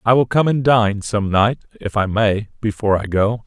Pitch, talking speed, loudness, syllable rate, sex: 110 Hz, 225 wpm, -18 LUFS, 4.9 syllables/s, male